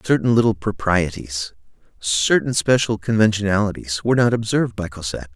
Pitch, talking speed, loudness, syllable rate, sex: 105 Hz, 125 wpm, -19 LUFS, 5.7 syllables/s, male